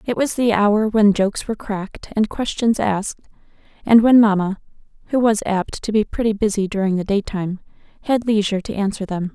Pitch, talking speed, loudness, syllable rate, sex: 210 Hz, 185 wpm, -19 LUFS, 5.7 syllables/s, female